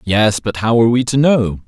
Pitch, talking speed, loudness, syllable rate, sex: 110 Hz, 250 wpm, -14 LUFS, 5.2 syllables/s, male